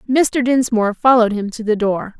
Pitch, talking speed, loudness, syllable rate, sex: 230 Hz, 190 wpm, -16 LUFS, 5.6 syllables/s, female